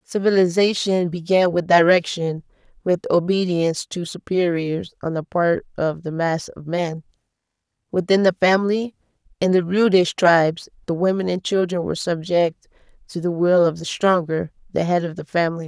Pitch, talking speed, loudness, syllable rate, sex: 175 Hz, 155 wpm, -20 LUFS, 5.0 syllables/s, female